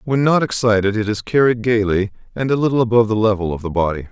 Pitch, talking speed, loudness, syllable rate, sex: 110 Hz, 235 wpm, -17 LUFS, 6.7 syllables/s, male